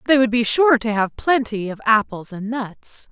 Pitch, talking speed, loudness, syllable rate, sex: 230 Hz, 210 wpm, -19 LUFS, 4.5 syllables/s, female